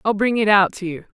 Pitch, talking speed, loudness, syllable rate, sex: 200 Hz, 305 wpm, -17 LUFS, 6.1 syllables/s, female